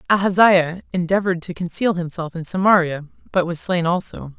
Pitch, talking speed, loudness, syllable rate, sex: 175 Hz, 150 wpm, -19 LUFS, 5.5 syllables/s, female